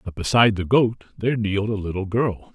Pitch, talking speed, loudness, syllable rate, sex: 105 Hz, 210 wpm, -21 LUFS, 6.0 syllables/s, male